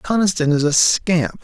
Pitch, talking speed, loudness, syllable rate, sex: 165 Hz, 165 wpm, -16 LUFS, 4.3 syllables/s, male